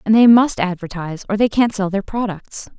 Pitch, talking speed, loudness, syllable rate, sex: 205 Hz, 215 wpm, -17 LUFS, 5.4 syllables/s, female